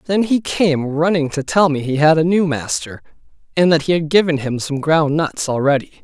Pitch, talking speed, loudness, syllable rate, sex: 155 Hz, 220 wpm, -17 LUFS, 5.2 syllables/s, male